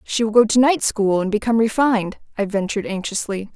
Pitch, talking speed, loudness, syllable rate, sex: 215 Hz, 205 wpm, -19 LUFS, 6.1 syllables/s, female